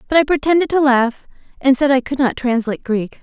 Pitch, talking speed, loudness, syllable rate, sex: 265 Hz, 225 wpm, -16 LUFS, 5.9 syllables/s, female